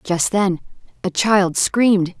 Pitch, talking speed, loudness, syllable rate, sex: 190 Hz, 135 wpm, -17 LUFS, 3.6 syllables/s, female